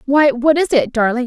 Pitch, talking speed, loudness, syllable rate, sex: 265 Hz, 240 wpm, -15 LUFS, 5.1 syllables/s, female